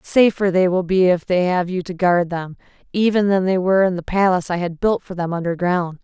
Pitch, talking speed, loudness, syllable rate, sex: 180 Hz, 240 wpm, -18 LUFS, 5.6 syllables/s, female